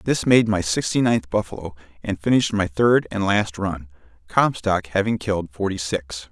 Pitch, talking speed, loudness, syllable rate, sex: 95 Hz, 170 wpm, -21 LUFS, 4.9 syllables/s, male